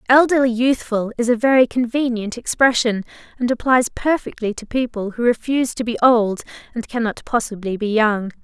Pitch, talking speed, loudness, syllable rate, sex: 235 Hz, 155 wpm, -19 LUFS, 5.3 syllables/s, female